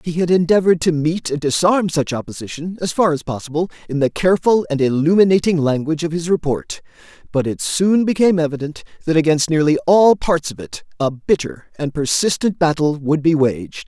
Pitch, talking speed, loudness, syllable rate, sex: 160 Hz, 180 wpm, -17 LUFS, 5.6 syllables/s, male